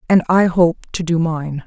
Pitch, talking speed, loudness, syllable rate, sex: 170 Hz, 215 wpm, -17 LUFS, 4.2 syllables/s, female